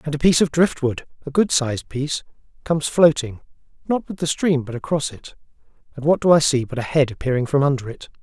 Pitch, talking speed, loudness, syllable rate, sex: 145 Hz, 220 wpm, -20 LUFS, 6.3 syllables/s, male